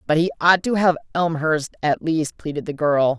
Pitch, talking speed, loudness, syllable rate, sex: 160 Hz, 205 wpm, -20 LUFS, 4.7 syllables/s, female